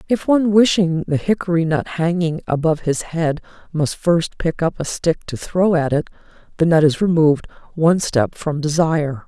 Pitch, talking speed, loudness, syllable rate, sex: 165 Hz, 180 wpm, -18 LUFS, 5.1 syllables/s, female